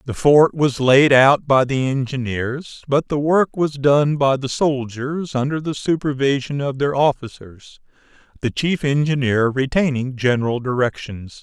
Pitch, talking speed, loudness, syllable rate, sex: 135 Hz, 145 wpm, -18 LUFS, 4.2 syllables/s, male